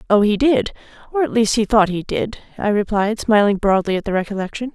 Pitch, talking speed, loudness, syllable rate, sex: 215 Hz, 200 wpm, -18 LUFS, 5.8 syllables/s, female